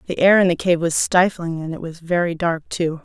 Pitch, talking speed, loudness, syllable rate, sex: 170 Hz, 255 wpm, -19 LUFS, 5.3 syllables/s, female